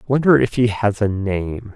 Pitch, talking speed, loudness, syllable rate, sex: 110 Hz, 205 wpm, -18 LUFS, 4.4 syllables/s, male